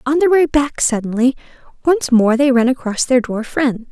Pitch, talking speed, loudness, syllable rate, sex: 260 Hz, 200 wpm, -15 LUFS, 4.9 syllables/s, female